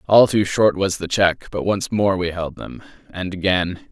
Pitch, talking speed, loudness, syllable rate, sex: 95 Hz, 200 wpm, -19 LUFS, 4.4 syllables/s, male